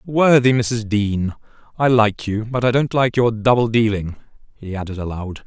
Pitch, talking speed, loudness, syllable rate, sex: 115 Hz, 175 wpm, -18 LUFS, 4.7 syllables/s, male